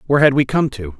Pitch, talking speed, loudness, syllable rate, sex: 135 Hz, 300 wpm, -16 LUFS, 7.3 syllables/s, male